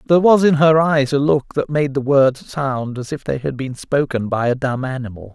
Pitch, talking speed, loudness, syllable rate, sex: 140 Hz, 245 wpm, -17 LUFS, 5.1 syllables/s, male